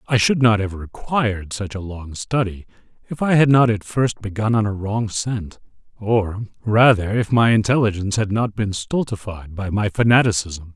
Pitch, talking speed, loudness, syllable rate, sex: 105 Hz, 180 wpm, -19 LUFS, 4.9 syllables/s, male